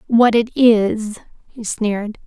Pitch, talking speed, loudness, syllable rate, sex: 220 Hz, 135 wpm, -16 LUFS, 3.4 syllables/s, female